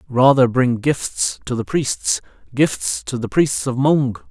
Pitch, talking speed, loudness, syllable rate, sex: 125 Hz, 165 wpm, -18 LUFS, 3.6 syllables/s, male